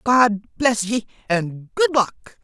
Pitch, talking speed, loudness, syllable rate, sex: 210 Hz, 150 wpm, -20 LUFS, 3.6 syllables/s, male